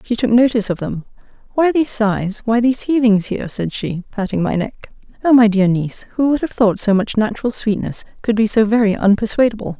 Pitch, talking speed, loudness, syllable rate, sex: 220 Hz, 195 wpm, -17 LUFS, 5.9 syllables/s, female